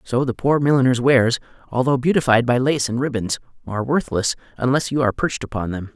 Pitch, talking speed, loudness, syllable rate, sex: 125 Hz, 190 wpm, -20 LUFS, 6.3 syllables/s, male